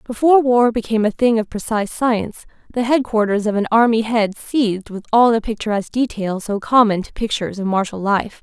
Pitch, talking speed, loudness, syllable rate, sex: 220 Hz, 190 wpm, -18 LUFS, 5.8 syllables/s, female